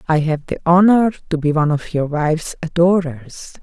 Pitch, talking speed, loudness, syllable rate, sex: 165 Hz, 180 wpm, -17 LUFS, 5.3 syllables/s, female